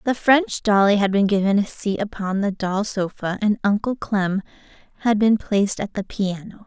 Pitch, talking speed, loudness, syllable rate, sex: 205 Hz, 190 wpm, -21 LUFS, 4.8 syllables/s, female